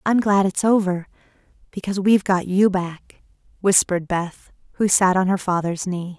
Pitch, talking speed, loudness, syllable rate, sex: 190 Hz, 165 wpm, -20 LUFS, 5.0 syllables/s, female